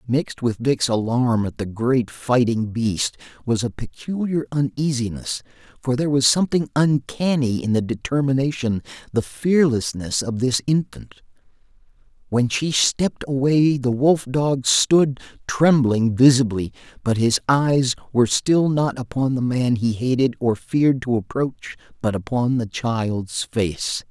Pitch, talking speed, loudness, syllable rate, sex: 130 Hz, 140 wpm, -20 LUFS, 4.2 syllables/s, male